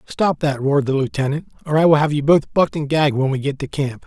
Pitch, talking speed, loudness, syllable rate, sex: 145 Hz, 280 wpm, -18 LUFS, 6.5 syllables/s, male